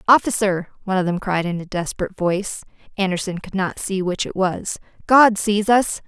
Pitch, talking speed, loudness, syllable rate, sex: 195 Hz, 170 wpm, -20 LUFS, 5.5 syllables/s, female